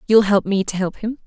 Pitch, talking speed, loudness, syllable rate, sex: 205 Hz, 285 wpm, -19 LUFS, 5.7 syllables/s, female